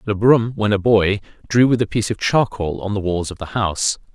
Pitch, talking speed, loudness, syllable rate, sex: 105 Hz, 245 wpm, -18 LUFS, 5.6 syllables/s, male